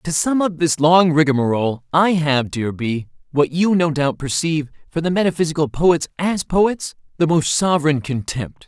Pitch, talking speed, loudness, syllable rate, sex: 160 Hz, 175 wpm, -18 LUFS, 4.7 syllables/s, male